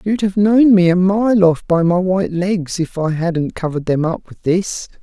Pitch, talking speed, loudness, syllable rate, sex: 180 Hz, 225 wpm, -16 LUFS, 4.8 syllables/s, male